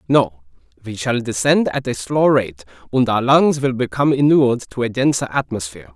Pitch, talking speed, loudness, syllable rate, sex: 120 Hz, 180 wpm, -17 LUFS, 5.4 syllables/s, male